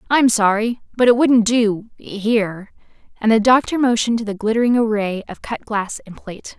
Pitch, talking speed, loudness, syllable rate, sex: 225 Hz, 175 wpm, -17 LUFS, 5.2 syllables/s, female